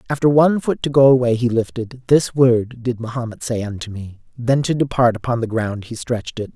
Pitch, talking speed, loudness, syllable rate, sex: 120 Hz, 220 wpm, -18 LUFS, 5.5 syllables/s, male